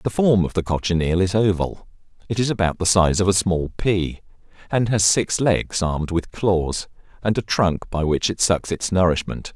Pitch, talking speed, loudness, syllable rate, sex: 95 Hz, 200 wpm, -20 LUFS, 4.7 syllables/s, male